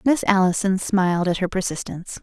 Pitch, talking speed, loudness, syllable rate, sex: 190 Hz, 160 wpm, -21 LUFS, 5.7 syllables/s, female